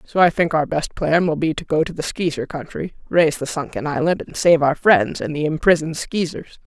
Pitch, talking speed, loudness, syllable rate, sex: 160 Hz, 230 wpm, -19 LUFS, 5.6 syllables/s, female